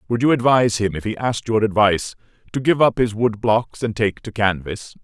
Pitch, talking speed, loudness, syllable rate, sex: 110 Hz, 225 wpm, -19 LUFS, 5.6 syllables/s, male